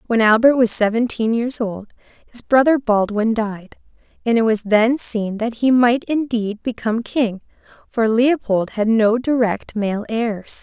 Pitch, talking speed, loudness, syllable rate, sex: 225 Hz, 160 wpm, -18 LUFS, 4.2 syllables/s, female